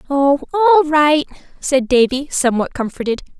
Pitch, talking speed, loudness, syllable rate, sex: 285 Hz, 125 wpm, -15 LUFS, 5.2 syllables/s, female